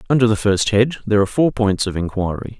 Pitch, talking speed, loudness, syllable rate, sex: 110 Hz, 230 wpm, -18 LUFS, 6.6 syllables/s, male